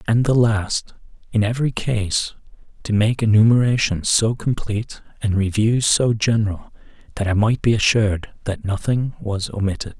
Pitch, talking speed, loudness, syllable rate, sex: 110 Hz, 145 wpm, -19 LUFS, 4.9 syllables/s, male